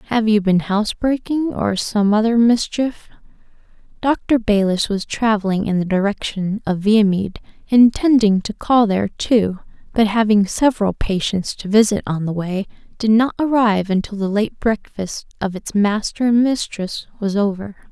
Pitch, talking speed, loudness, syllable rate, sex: 210 Hz, 155 wpm, -18 LUFS, 4.7 syllables/s, female